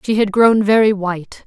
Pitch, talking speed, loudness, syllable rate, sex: 205 Hz, 205 wpm, -14 LUFS, 5.2 syllables/s, female